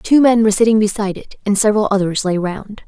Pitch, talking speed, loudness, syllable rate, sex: 210 Hz, 230 wpm, -15 LUFS, 6.5 syllables/s, female